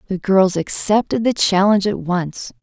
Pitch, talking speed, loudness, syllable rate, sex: 190 Hz, 160 wpm, -17 LUFS, 4.7 syllables/s, female